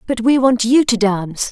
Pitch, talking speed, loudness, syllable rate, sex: 235 Hz, 235 wpm, -15 LUFS, 5.1 syllables/s, female